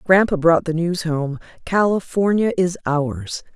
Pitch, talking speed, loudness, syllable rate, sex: 170 Hz, 135 wpm, -19 LUFS, 4.0 syllables/s, female